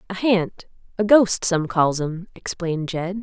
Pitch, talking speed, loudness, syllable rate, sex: 185 Hz, 165 wpm, -21 LUFS, 4.1 syllables/s, female